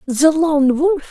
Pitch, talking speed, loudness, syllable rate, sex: 300 Hz, 165 wpm, -15 LUFS, 3.3 syllables/s, female